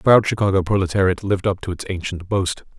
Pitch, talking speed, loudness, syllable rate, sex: 95 Hz, 215 wpm, -20 LUFS, 6.5 syllables/s, male